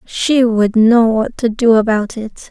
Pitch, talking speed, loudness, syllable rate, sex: 225 Hz, 190 wpm, -13 LUFS, 3.7 syllables/s, female